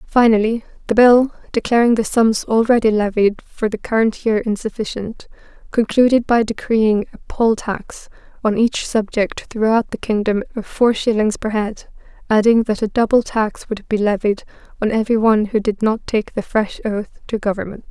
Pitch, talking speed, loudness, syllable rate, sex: 220 Hz, 170 wpm, -17 LUFS, 4.9 syllables/s, female